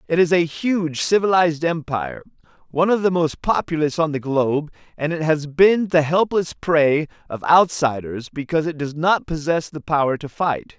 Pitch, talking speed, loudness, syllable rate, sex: 160 Hz, 180 wpm, -20 LUFS, 5.0 syllables/s, male